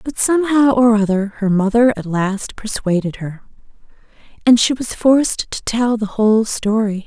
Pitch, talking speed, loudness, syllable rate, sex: 220 Hz, 160 wpm, -16 LUFS, 4.7 syllables/s, female